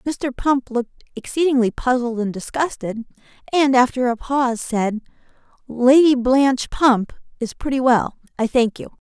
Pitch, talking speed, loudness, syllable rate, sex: 250 Hz, 140 wpm, -19 LUFS, 4.6 syllables/s, female